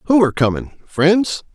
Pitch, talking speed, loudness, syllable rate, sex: 165 Hz, 115 wpm, -16 LUFS, 5.0 syllables/s, male